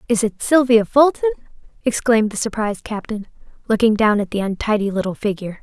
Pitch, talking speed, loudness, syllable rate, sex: 220 Hz, 160 wpm, -18 LUFS, 6.2 syllables/s, female